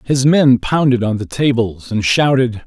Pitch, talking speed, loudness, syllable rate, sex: 125 Hz, 180 wpm, -14 LUFS, 4.3 syllables/s, male